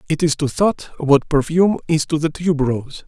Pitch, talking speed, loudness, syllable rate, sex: 155 Hz, 195 wpm, -18 LUFS, 5.5 syllables/s, male